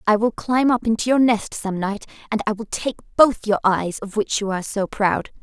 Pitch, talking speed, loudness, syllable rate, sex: 215 Hz, 245 wpm, -21 LUFS, 4.9 syllables/s, female